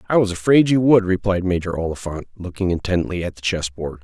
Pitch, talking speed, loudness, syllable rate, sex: 95 Hz, 210 wpm, -19 LUFS, 5.9 syllables/s, male